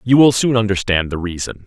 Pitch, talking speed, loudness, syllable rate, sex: 105 Hz, 215 wpm, -16 LUFS, 5.7 syllables/s, male